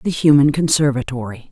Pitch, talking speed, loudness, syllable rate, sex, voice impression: 140 Hz, 120 wpm, -16 LUFS, 5.4 syllables/s, female, feminine, slightly adult-like, slightly tensed, sincere, slightly kind